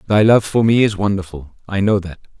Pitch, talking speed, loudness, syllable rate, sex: 100 Hz, 225 wpm, -16 LUFS, 5.7 syllables/s, male